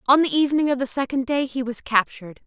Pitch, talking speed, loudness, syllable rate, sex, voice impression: 260 Hz, 245 wpm, -21 LUFS, 6.6 syllables/s, female, gender-neutral, slightly young, tensed, powerful, bright, clear, intellectual, friendly, lively, slightly kind, slightly intense